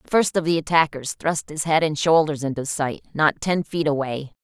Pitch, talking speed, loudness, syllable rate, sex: 155 Hz, 215 wpm, -22 LUFS, 5.1 syllables/s, female